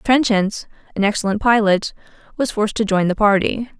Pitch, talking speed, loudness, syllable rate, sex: 210 Hz, 160 wpm, -18 LUFS, 5.5 syllables/s, female